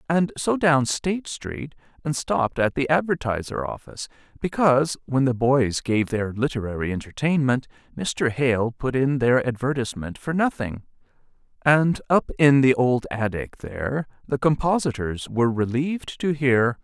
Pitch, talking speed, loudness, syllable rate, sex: 130 Hz, 145 wpm, -23 LUFS, 4.8 syllables/s, male